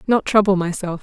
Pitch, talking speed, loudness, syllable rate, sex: 190 Hz, 175 wpm, -18 LUFS, 5.6 syllables/s, female